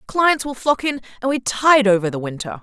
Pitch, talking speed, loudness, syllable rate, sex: 235 Hz, 230 wpm, -18 LUFS, 5.7 syllables/s, female